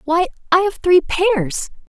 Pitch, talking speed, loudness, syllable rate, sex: 335 Hz, 150 wpm, -17 LUFS, 3.7 syllables/s, female